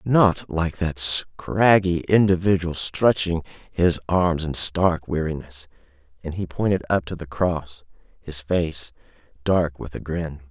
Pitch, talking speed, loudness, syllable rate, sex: 85 Hz, 135 wpm, -22 LUFS, 3.8 syllables/s, male